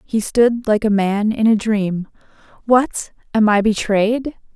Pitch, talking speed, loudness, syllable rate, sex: 215 Hz, 160 wpm, -17 LUFS, 3.7 syllables/s, female